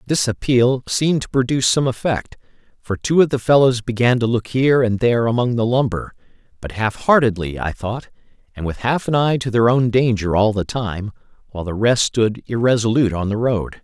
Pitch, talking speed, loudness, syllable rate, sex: 120 Hz, 200 wpm, -18 LUFS, 5.5 syllables/s, male